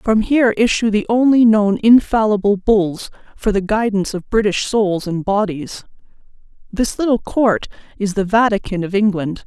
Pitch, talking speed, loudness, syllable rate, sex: 210 Hz, 150 wpm, -16 LUFS, 4.8 syllables/s, female